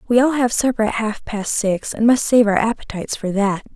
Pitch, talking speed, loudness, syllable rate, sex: 220 Hz, 240 wpm, -18 LUFS, 5.5 syllables/s, female